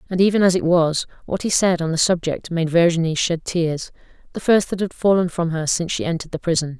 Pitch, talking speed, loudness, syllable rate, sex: 170 Hz, 230 wpm, -19 LUFS, 6.0 syllables/s, female